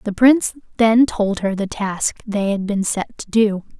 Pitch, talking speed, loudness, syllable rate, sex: 210 Hz, 205 wpm, -18 LUFS, 4.4 syllables/s, female